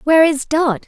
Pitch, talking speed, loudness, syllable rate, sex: 295 Hz, 205 wpm, -15 LUFS, 5.3 syllables/s, male